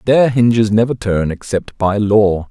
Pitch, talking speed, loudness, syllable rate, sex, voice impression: 105 Hz, 170 wpm, -14 LUFS, 4.2 syllables/s, male, very masculine, very adult-like, slightly middle-aged, very thick, tensed, powerful, slightly bright, soft, slightly muffled, fluent, very cool, very intellectual, slightly sincere, very calm, very mature, very friendly, very reassuring, very elegant, slightly wild, very sweet, slightly lively, very kind